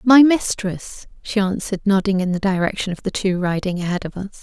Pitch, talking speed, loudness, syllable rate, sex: 195 Hz, 205 wpm, -20 LUFS, 5.7 syllables/s, female